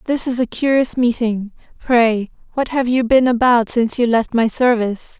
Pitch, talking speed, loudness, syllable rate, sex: 240 Hz, 185 wpm, -17 LUFS, 4.9 syllables/s, female